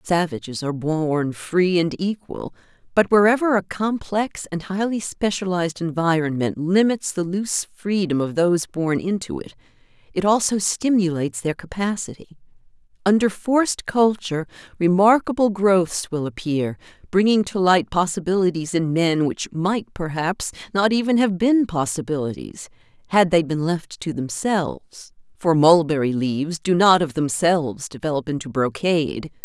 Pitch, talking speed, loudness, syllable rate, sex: 180 Hz, 130 wpm, -21 LUFS, 4.7 syllables/s, female